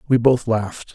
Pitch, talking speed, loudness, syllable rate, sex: 115 Hz, 190 wpm, -19 LUFS, 5.2 syllables/s, male